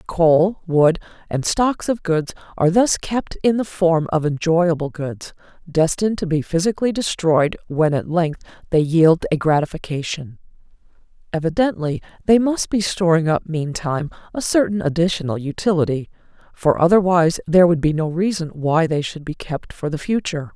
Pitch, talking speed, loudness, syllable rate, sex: 170 Hz, 155 wpm, -19 LUFS, 5.1 syllables/s, female